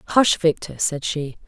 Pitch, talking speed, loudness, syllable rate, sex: 170 Hz, 160 wpm, -21 LUFS, 4.8 syllables/s, female